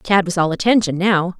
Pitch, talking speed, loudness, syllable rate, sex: 185 Hz, 215 wpm, -17 LUFS, 5.3 syllables/s, female